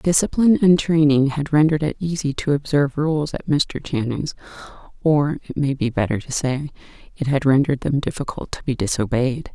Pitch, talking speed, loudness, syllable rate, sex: 145 Hz, 175 wpm, -20 LUFS, 5.4 syllables/s, female